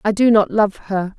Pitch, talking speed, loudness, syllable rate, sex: 205 Hz, 255 wpm, -17 LUFS, 4.6 syllables/s, female